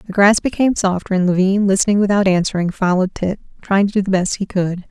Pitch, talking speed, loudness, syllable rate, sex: 195 Hz, 220 wpm, -16 LUFS, 6.4 syllables/s, female